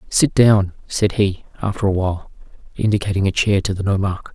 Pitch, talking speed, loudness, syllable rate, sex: 100 Hz, 180 wpm, -18 LUFS, 5.7 syllables/s, male